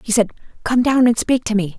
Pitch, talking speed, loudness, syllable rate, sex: 230 Hz, 270 wpm, -17 LUFS, 5.8 syllables/s, female